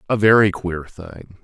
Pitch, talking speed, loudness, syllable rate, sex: 95 Hz, 170 wpm, -17 LUFS, 4.1 syllables/s, male